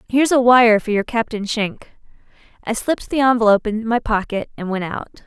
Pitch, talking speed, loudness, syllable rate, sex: 225 Hz, 195 wpm, -18 LUFS, 5.7 syllables/s, female